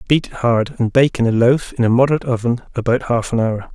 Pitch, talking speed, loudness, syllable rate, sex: 120 Hz, 240 wpm, -17 LUFS, 5.8 syllables/s, male